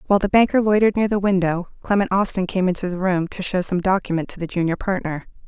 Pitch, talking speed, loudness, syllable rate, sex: 190 Hz, 230 wpm, -20 LUFS, 6.6 syllables/s, female